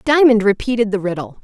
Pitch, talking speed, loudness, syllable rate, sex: 215 Hz, 170 wpm, -16 LUFS, 6.2 syllables/s, female